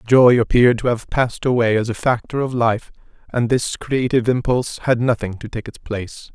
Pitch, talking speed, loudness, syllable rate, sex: 120 Hz, 200 wpm, -18 LUFS, 5.5 syllables/s, male